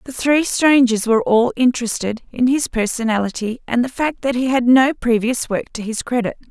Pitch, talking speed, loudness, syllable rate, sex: 245 Hz, 195 wpm, -17 LUFS, 5.3 syllables/s, female